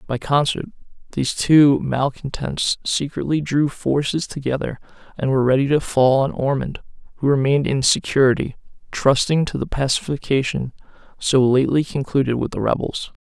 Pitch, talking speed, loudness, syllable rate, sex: 135 Hz, 135 wpm, -19 LUFS, 5.3 syllables/s, male